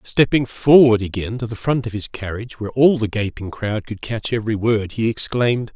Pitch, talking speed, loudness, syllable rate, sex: 115 Hz, 210 wpm, -19 LUFS, 5.5 syllables/s, male